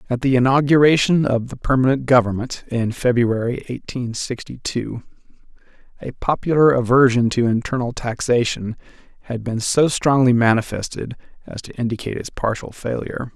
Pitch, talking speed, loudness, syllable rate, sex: 125 Hz, 130 wpm, -19 LUFS, 5.2 syllables/s, male